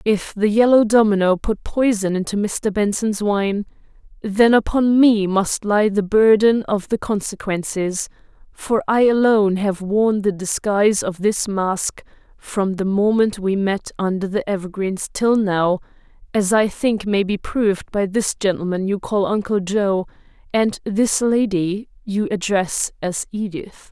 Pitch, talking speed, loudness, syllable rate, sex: 205 Hz, 150 wpm, -19 LUFS, 4.1 syllables/s, female